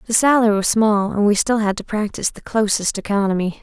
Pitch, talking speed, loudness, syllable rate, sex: 210 Hz, 215 wpm, -18 LUFS, 6.1 syllables/s, female